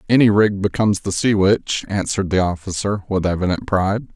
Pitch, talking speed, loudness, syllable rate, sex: 100 Hz, 175 wpm, -18 LUFS, 5.7 syllables/s, male